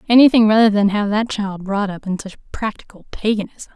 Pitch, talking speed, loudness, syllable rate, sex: 210 Hz, 190 wpm, -17 LUFS, 5.6 syllables/s, female